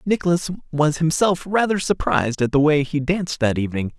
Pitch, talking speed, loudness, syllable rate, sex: 155 Hz, 180 wpm, -20 LUFS, 5.7 syllables/s, male